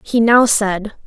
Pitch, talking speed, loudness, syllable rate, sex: 220 Hz, 170 wpm, -13 LUFS, 3.3 syllables/s, female